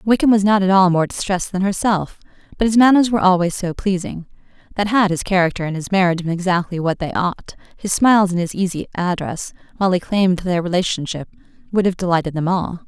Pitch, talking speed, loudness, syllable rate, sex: 185 Hz, 205 wpm, -18 LUFS, 6.3 syllables/s, female